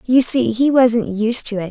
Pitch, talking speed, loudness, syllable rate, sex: 235 Hz, 245 wpm, -16 LUFS, 4.2 syllables/s, female